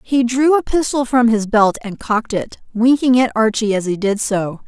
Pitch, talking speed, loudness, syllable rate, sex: 230 Hz, 220 wpm, -16 LUFS, 4.9 syllables/s, female